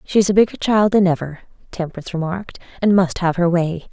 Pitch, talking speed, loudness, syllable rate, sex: 180 Hz, 200 wpm, -18 LUFS, 6.0 syllables/s, female